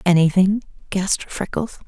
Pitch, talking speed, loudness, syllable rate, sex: 190 Hz, 95 wpm, -20 LUFS, 4.8 syllables/s, female